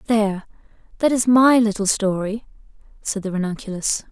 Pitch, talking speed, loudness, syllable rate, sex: 210 Hz, 130 wpm, -19 LUFS, 5.3 syllables/s, female